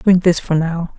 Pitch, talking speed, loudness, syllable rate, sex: 175 Hz, 245 wpm, -16 LUFS, 4.2 syllables/s, female